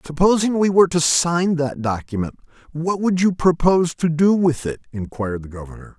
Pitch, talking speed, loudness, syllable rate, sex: 155 Hz, 180 wpm, -19 LUFS, 5.4 syllables/s, male